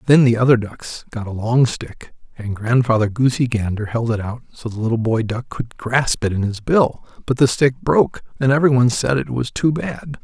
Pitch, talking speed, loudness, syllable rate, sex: 120 Hz, 225 wpm, -18 LUFS, 5.2 syllables/s, male